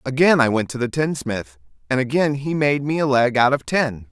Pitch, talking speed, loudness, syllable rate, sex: 135 Hz, 235 wpm, -19 LUFS, 5.2 syllables/s, male